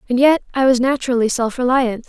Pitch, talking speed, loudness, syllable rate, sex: 250 Hz, 200 wpm, -16 LUFS, 6.2 syllables/s, female